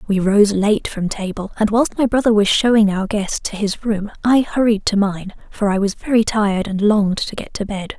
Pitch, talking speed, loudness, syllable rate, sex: 205 Hz, 235 wpm, -17 LUFS, 5.1 syllables/s, female